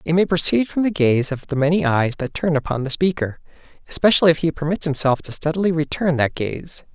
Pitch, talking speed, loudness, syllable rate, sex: 155 Hz, 215 wpm, -19 LUFS, 5.9 syllables/s, male